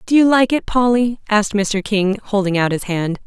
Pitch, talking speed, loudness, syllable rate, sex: 215 Hz, 220 wpm, -17 LUFS, 5.0 syllables/s, female